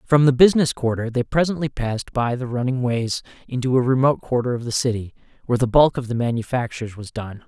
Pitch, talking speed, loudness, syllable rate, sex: 125 Hz, 210 wpm, -21 LUFS, 6.3 syllables/s, male